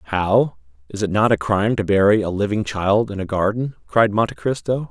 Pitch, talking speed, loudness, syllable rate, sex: 105 Hz, 210 wpm, -19 LUFS, 5.2 syllables/s, male